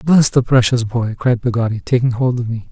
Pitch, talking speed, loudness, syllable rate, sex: 120 Hz, 220 wpm, -16 LUFS, 5.4 syllables/s, male